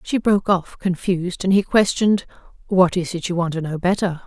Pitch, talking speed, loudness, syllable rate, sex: 180 Hz, 210 wpm, -20 LUFS, 5.6 syllables/s, female